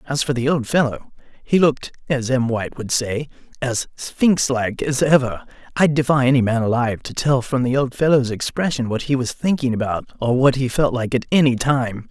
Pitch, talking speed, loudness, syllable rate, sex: 130 Hz, 210 wpm, -19 LUFS, 5.4 syllables/s, male